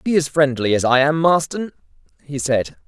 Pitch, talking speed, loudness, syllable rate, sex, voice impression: 145 Hz, 190 wpm, -18 LUFS, 5.0 syllables/s, male, masculine, adult-like, slightly thick, cool, slightly intellectual, slightly kind